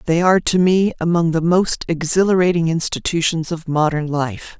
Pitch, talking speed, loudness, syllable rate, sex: 165 Hz, 155 wpm, -17 LUFS, 5.1 syllables/s, female